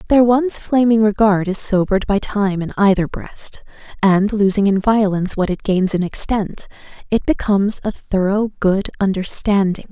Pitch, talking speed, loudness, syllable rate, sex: 200 Hz, 155 wpm, -17 LUFS, 4.7 syllables/s, female